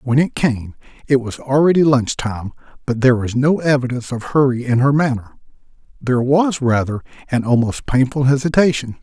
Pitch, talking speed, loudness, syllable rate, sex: 130 Hz, 165 wpm, -17 LUFS, 5.4 syllables/s, male